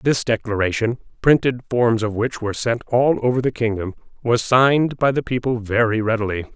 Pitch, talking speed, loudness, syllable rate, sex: 120 Hz, 175 wpm, -19 LUFS, 5.4 syllables/s, male